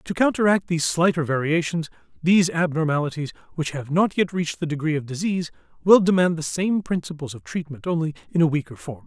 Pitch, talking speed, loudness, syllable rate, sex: 165 Hz, 185 wpm, -22 LUFS, 6.2 syllables/s, male